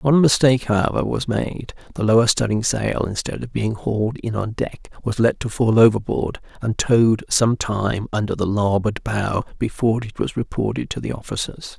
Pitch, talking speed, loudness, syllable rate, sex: 110 Hz, 185 wpm, -20 LUFS, 5.1 syllables/s, male